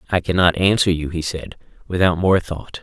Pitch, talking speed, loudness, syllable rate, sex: 90 Hz, 190 wpm, -18 LUFS, 5.2 syllables/s, male